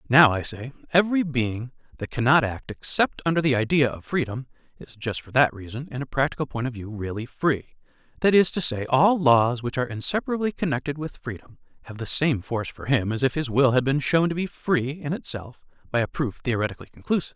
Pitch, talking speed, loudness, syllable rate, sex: 135 Hz, 215 wpm, -24 LUFS, 5.9 syllables/s, male